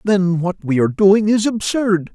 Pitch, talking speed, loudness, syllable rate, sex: 195 Hz, 195 wpm, -16 LUFS, 4.4 syllables/s, male